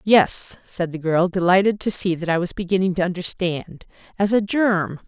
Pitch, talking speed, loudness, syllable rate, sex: 185 Hz, 190 wpm, -21 LUFS, 4.8 syllables/s, female